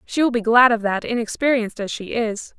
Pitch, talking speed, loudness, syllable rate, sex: 230 Hz, 230 wpm, -19 LUFS, 5.7 syllables/s, female